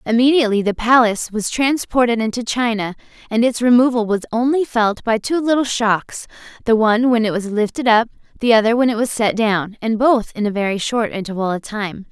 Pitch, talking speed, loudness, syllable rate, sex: 230 Hz, 200 wpm, -17 LUFS, 5.6 syllables/s, female